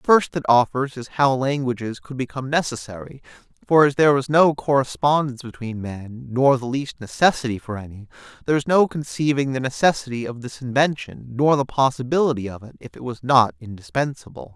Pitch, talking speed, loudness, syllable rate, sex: 130 Hz, 175 wpm, -21 LUFS, 5.7 syllables/s, male